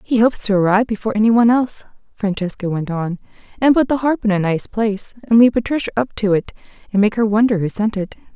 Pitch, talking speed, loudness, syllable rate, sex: 215 Hz, 230 wpm, -17 LUFS, 6.7 syllables/s, female